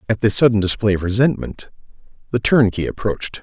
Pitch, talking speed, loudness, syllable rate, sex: 110 Hz, 160 wpm, -17 LUFS, 6.1 syllables/s, male